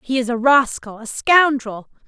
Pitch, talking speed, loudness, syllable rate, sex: 250 Hz, 175 wpm, -16 LUFS, 4.4 syllables/s, female